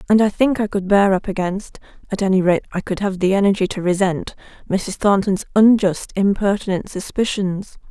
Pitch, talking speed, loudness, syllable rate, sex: 195 Hz, 165 wpm, -18 LUFS, 5.2 syllables/s, female